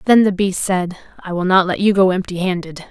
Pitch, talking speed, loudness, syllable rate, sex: 185 Hz, 250 wpm, -17 LUFS, 5.6 syllables/s, female